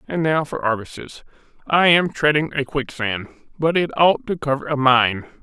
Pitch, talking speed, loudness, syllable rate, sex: 145 Hz, 165 wpm, -19 LUFS, 4.9 syllables/s, male